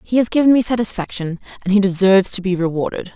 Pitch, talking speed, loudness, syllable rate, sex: 200 Hz, 210 wpm, -16 LUFS, 6.7 syllables/s, female